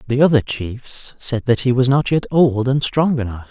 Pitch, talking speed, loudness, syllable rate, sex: 125 Hz, 220 wpm, -17 LUFS, 4.7 syllables/s, male